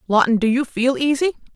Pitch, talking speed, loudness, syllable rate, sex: 255 Hz, 195 wpm, -19 LUFS, 5.9 syllables/s, female